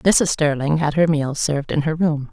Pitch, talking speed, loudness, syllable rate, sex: 155 Hz, 235 wpm, -19 LUFS, 4.9 syllables/s, female